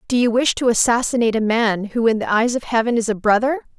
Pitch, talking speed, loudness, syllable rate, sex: 230 Hz, 255 wpm, -18 LUFS, 6.4 syllables/s, female